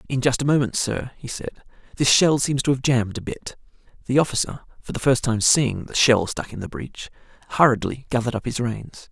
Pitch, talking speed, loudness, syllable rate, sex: 130 Hz, 215 wpm, -21 LUFS, 5.7 syllables/s, male